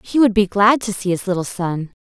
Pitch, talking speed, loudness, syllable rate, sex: 200 Hz, 265 wpm, -18 LUFS, 5.4 syllables/s, female